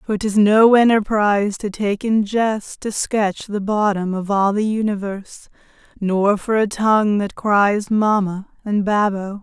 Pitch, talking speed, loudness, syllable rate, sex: 205 Hz, 160 wpm, -18 LUFS, 4.0 syllables/s, female